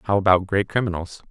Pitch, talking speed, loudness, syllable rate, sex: 95 Hz, 185 wpm, -21 LUFS, 5.7 syllables/s, male